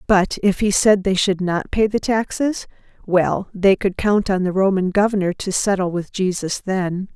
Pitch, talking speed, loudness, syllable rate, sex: 195 Hz, 185 wpm, -19 LUFS, 4.4 syllables/s, female